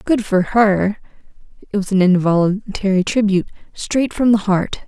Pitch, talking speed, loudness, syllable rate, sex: 200 Hz, 135 wpm, -17 LUFS, 4.8 syllables/s, female